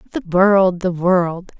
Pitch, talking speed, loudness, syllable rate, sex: 185 Hz, 115 wpm, -16 LUFS, 3.2 syllables/s, female